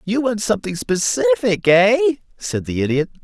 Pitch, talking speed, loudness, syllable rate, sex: 210 Hz, 150 wpm, -18 LUFS, 5.0 syllables/s, male